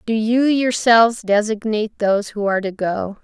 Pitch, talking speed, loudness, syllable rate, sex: 215 Hz, 165 wpm, -18 LUFS, 5.2 syllables/s, female